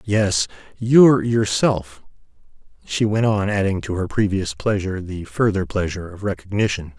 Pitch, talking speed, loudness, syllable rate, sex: 100 Hz, 135 wpm, -20 LUFS, 4.8 syllables/s, male